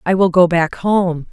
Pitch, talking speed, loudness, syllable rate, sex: 175 Hz, 225 wpm, -15 LUFS, 4.2 syllables/s, female